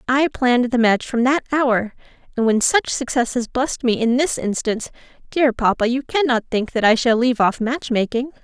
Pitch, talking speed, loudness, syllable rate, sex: 250 Hz, 205 wpm, -19 LUFS, 5.3 syllables/s, female